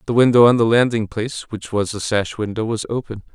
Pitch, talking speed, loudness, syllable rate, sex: 110 Hz, 235 wpm, -18 LUFS, 5.8 syllables/s, male